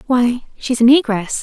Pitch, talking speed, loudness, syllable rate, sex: 245 Hz, 170 wpm, -15 LUFS, 4.2 syllables/s, female